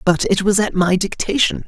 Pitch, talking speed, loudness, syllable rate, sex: 190 Hz, 215 wpm, -17 LUFS, 5.1 syllables/s, male